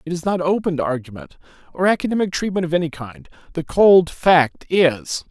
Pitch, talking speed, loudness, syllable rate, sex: 170 Hz, 180 wpm, -18 LUFS, 5.3 syllables/s, male